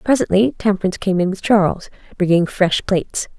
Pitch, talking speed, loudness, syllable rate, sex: 195 Hz, 160 wpm, -17 LUFS, 5.8 syllables/s, female